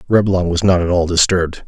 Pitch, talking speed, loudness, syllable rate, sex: 90 Hz, 215 wpm, -15 LUFS, 6.0 syllables/s, male